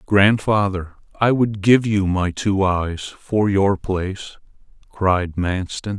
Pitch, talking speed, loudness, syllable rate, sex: 100 Hz, 130 wpm, -19 LUFS, 3.3 syllables/s, male